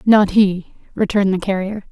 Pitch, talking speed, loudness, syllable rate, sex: 195 Hz, 155 wpm, -17 LUFS, 5.1 syllables/s, female